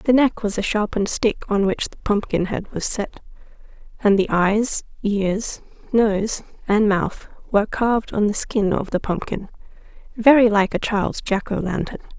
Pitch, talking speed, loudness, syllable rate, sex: 210 Hz, 165 wpm, -21 LUFS, 4.5 syllables/s, female